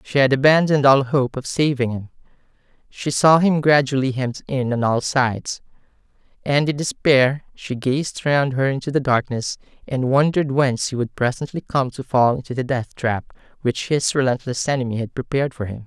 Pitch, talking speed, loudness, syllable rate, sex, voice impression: 135 Hz, 180 wpm, -20 LUFS, 5.3 syllables/s, male, very masculine, gender-neutral, very adult-like, slightly thick, tensed, slightly powerful, bright, slightly soft, clear, fluent, slightly nasal, cool, intellectual, very refreshing, sincere, calm, friendly, reassuring, unique, elegant, slightly wild, sweet, lively, kind, modest